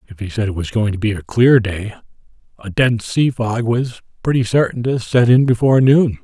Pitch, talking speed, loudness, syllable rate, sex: 115 Hz, 220 wpm, -16 LUFS, 5.4 syllables/s, male